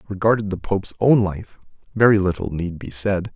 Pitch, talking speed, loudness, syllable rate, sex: 95 Hz, 195 wpm, -20 LUFS, 5.7 syllables/s, male